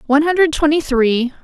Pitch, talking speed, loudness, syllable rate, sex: 290 Hz, 170 wpm, -15 LUFS, 5.9 syllables/s, female